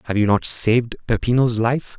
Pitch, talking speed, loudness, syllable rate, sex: 115 Hz, 180 wpm, -19 LUFS, 5.2 syllables/s, male